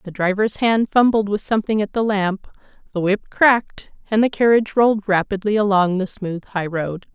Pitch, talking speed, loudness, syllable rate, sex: 205 Hz, 175 wpm, -19 LUFS, 5.3 syllables/s, female